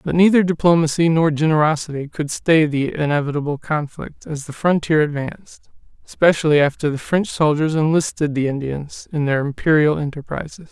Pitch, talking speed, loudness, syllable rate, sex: 155 Hz, 145 wpm, -18 LUFS, 5.4 syllables/s, male